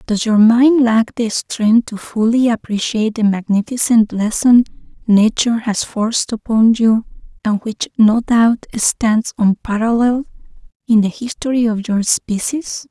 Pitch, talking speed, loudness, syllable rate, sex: 225 Hz, 135 wpm, -15 LUFS, 4.3 syllables/s, female